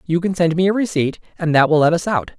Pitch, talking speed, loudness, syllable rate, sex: 170 Hz, 300 wpm, -17 LUFS, 6.4 syllables/s, male